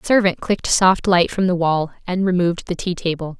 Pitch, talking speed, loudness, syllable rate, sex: 180 Hz, 230 wpm, -18 LUFS, 5.6 syllables/s, female